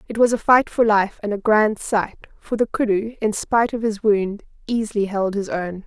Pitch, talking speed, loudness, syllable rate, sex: 215 Hz, 225 wpm, -20 LUFS, 5.0 syllables/s, female